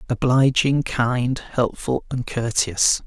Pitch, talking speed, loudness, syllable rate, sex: 125 Hz, 100 wpm, -21 LUFS, 3.2 syllables/s, male